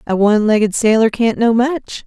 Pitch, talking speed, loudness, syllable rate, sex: 225 Hz, 205 wpm, -14 LUFS, 5.2 syllables/s, female